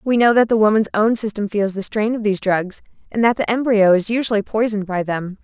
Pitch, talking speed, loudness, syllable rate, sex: 215 Hz, 245 wpm, -18 LUFS, 6.0 syllables/s, female